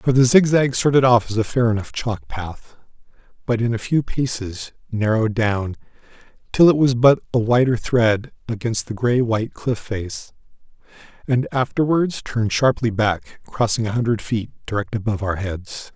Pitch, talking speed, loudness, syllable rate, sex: 115 Hz, 165 wpm, -20 LUFS, 4.8 syllables/s, male